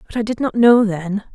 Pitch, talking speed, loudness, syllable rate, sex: 215 Hz, 265 wpm, -16 LUFS, 5.3 syllables/s, female